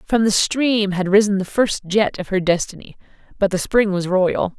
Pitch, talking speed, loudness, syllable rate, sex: 200 Hz, 210 wpm, -18 LUFS, 4.7 syllables/s, female